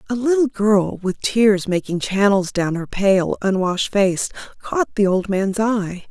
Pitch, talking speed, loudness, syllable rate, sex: 200 Hz, 165 wpm, -19 LUFS, 4.0 syllables/s, female